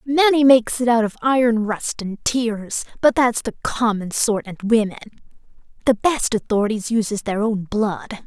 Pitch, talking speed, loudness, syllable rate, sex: 225 Hz, 165 wpm, -19 LUFS, 4.8 syllables/s, female